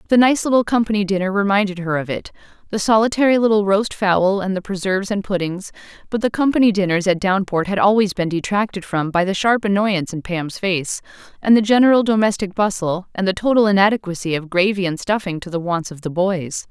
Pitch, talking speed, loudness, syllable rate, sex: 195 Hz, 200 wpm, -18 LUFS, 5.9 syllables/s, female